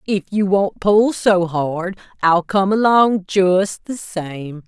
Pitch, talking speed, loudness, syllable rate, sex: 190 Hz, 155 wpm, -17 LUFS, 3.1 syllables/s, female